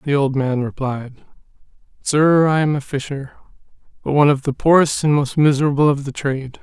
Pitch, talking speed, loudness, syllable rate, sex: 140 Hz, 180 wpm, -17 LUFS, 5.6 syllables/s, male